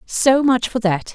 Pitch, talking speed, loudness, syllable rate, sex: 235 Hz, 210 wpm, -17 LUFS, 3.9 syllables/s, female